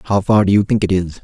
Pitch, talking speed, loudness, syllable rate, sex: 100 Hz, 340 wpm, -15 LUFS, 6.8 syllables/s, male